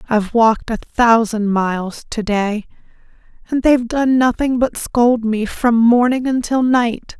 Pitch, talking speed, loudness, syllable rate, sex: 235 Hz, 160 wpm, -16 LUFS, 4.3 syllables/s, female